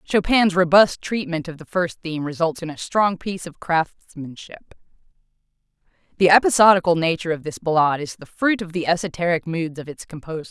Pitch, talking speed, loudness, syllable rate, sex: 170 Hz, 170 wpm, -20 LUFS, 5.9 syllables/s, female